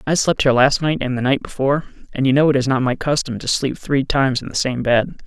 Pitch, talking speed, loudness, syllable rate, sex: 135 Hz, 285 wpm, -18 LUFS, 6.4 syllables/s, male